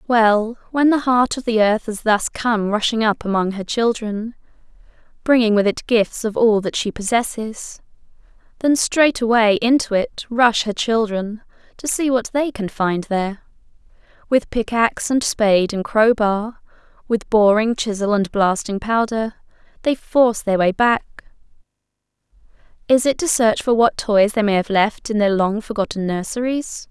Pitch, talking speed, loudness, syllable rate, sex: 220 Hz, 160 wpm, -18 LUFS, 4.4 syllables/s, female